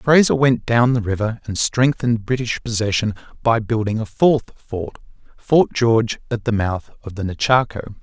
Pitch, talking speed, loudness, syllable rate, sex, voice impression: 115 Hz, 155 wpm, -19 LUFS, 4.7 syllables/s, male, masculine, middle-aged, tensed, bright, slightly muffled, intellectual, friendly, reassuring, lively, kind